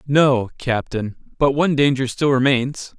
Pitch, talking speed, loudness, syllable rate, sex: 130 Hz, 140 wpm, -19 LUFS, 4.3 syllables/s, male